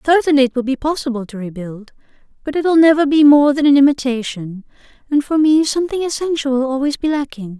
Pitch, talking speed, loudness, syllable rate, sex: 275 Hz, 195 wpm, -15 LUFS, 6.1 syllables/s, female